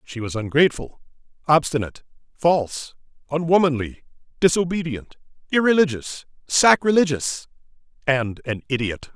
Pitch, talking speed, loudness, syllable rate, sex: 145 Hz, 80 wpm, -21 LUFS, 5.0 syllables/s, male